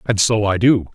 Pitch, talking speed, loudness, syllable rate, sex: 105 Hz, 255 wpm, -16 LUFS, 4.8 syllables/s, male